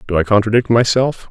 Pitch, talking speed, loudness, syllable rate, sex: 115 Hz, 185 wpm, -14 LUFS, 6.0 syllables/s, male